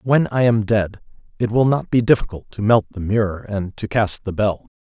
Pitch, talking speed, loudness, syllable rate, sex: 110 Hz, 225 wpm, -19 LUFS, 5.1 syllables/s, male